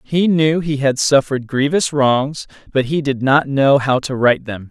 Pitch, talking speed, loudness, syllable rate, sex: 140 Hz, 205 wpm, -16 LUFS, 4.4 syllables/s, male